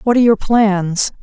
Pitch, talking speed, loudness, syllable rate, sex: 210 Hz, 195 wpm, -14 LUFS, 4.8 syllables/s, female